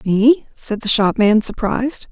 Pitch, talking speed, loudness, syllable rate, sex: 230 Hz, 140 wpm, -16 LUFS, 4.2 syllables/s, female